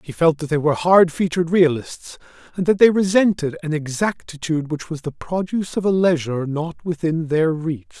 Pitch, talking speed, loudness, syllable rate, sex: 165 Hz, 190 wpm, -19 LUFS, 5.5 syllables/s, male